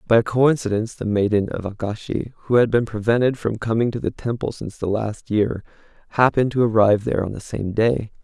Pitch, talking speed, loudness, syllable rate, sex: 110 Hz, 205 wpm, -21 LUFS, 5.9 syllables/s, male